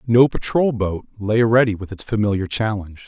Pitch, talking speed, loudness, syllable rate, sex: 110 Hz, 175 wpm, -19 LUFS, 5.3 syllables/s, male